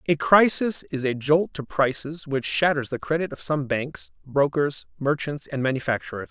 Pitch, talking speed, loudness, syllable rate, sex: 140 Hz, 170 wpm, -24 LUFS, 4.8 syllables/s, male